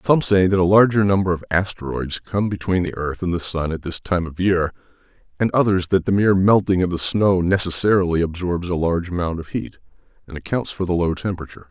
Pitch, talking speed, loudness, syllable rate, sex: 90 Hz, 215 wpm, -20 LUFS, 6.0 syllables/s, male